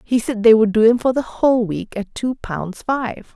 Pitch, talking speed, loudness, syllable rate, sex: 230 Hz, 250 wpm, -18 LUFS, 4.6 syllables/s, female